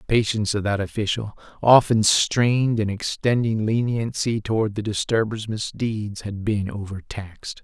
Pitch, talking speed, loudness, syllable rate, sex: 110 Hz, 135 wpm, -22 LUFS, 4.7 syllables/s, male